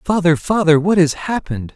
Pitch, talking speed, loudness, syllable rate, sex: 170 Hz, 170 wpm, -16 LUFS, 5.5 syllables/s, male